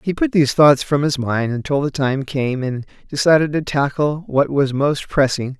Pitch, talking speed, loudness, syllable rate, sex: 145 Hz, 205 wpm, -18 LUFS, 4.8 syllables/s, male